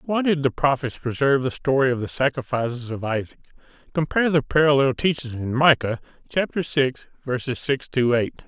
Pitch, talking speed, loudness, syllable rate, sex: 135 Hz, 170 wpm, -22 LUFS, 5.4 syllables/s, male